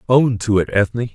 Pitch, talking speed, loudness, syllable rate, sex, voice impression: 115 Hz, 210 wpm, -17 LUFS, 5.3 syllables/s, male, very masculine, very adult-like, slightly thick, cool, sincere, slightly calm, slightly friendly